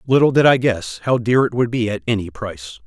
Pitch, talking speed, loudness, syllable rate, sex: 120 Hz, 250 wpm, -18 LUFS, 5.8 syllables/s, male